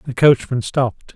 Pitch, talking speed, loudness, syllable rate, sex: 125 Hz, 155 wpm, -17 LUFS, 5.1 syllables/s, male